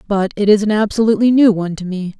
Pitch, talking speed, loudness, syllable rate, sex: 205 Hz, 245 wpm, -14 LUFS, 7.0 syllables/s, female